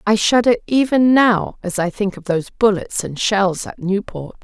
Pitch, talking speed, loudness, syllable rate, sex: 200 Hz, 190 wpm, -17 LUFS, 4.6 syllables/s, female